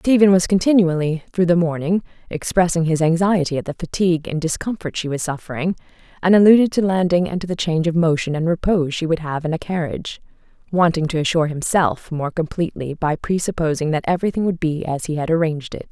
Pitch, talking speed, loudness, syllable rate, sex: 170 Hz, 195 wpm, -19 LUFS, 6.3 syllables/s, female